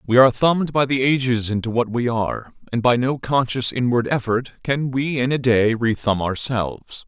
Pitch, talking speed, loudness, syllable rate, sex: 120 Hz, 195 wpm, -20 LUFS, 5.1 syllables/s, male